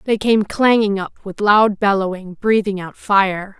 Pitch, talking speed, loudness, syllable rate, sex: 200 Hz, 165 wpm, -17 LUFS, 4.2 syllables/s, female